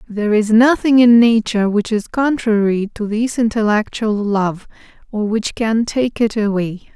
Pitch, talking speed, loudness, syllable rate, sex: 220 Hz, 155 wpm, -16 LUFS, 4.5 syllables/s, female